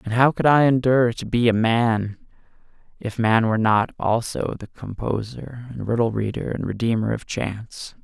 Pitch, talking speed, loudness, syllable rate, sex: 115 Hz, 170 wpm, -21 LUFS, 4.8 syllables/s, male